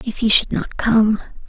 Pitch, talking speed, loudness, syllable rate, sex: 220 Hz, 205 wpm, -17 LUFS, 4.4 syllables/s, female